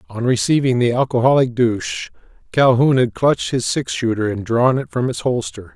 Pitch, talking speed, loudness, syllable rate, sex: 125 Hz, 175 wpm, -17 LUFS, 5.3 syllables/s, male